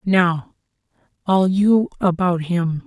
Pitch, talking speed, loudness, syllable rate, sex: 180 Hz, 105 wpm, -18 LUFS, 3.1 syllables/s, male